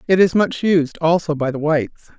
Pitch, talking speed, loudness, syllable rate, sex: 170 Hz, 220 wpm, -17 LUFS, 5.5 syllables/s, female